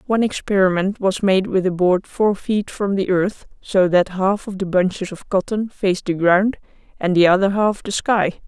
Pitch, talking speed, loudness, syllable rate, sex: 195 Hz, 205 wpm, -19 LUFS, 4.8 syllables/s, female